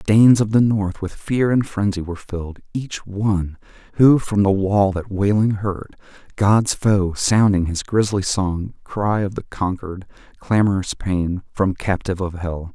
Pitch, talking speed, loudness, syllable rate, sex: 100 Hz, 165 wpm, -19 LUFS, 4.4 syllables/s, male